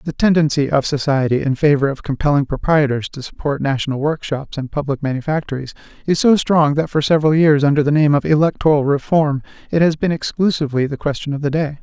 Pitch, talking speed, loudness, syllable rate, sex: 145 Hz, 195 wpm, -17 LUFS, 6.1 syllables/s, male